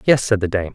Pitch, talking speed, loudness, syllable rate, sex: 105 Hz, 320 wpm, -18 LUFS, 6.2 syllables/s, male